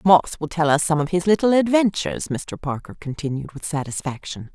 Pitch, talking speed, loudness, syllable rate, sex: 160 Hz, 185 wpm, -21 LUFS, 5.4 syllables/s, female